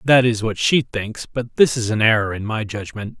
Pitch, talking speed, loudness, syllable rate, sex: 115 Hz, 245 wpm, -19 LUFS, 5.0 syllables/s, male